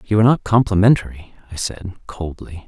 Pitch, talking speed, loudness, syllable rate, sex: 100 Hz, 155 wpm, -18 LUFS, 5.8 syllables/s, male